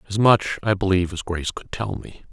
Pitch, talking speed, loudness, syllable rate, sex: 95 Hz, 235 wpm, -22 LUFS, 6.0 syllables/s, male